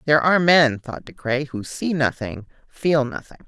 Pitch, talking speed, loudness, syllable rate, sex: 140 Hz, 190 wpm, -20 LUFS, 4.9 syllables/s, female